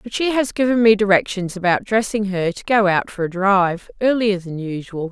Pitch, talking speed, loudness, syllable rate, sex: 200 Hz, 200 wpm, -18 LUFS, 5.2 syllables/s, female